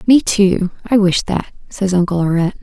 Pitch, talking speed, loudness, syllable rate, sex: 190 Hz, 185 wpm, -15 LUFS, 5.3 syllables/s, female